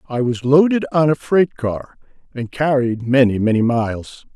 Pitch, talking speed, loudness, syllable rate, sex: 130 Hz, 165 wpm, -17 LUFS, 4.5 syllables/s, male